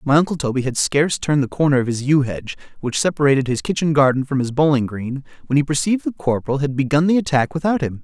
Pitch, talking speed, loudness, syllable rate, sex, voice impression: 140 Hz, 240 wpm, -19 LUFS, 6.8 syllables/s, male, masculine, adult-like, tensed, clear, fluent, cool, intellectual, slightly sincere, elegant, strict, sharp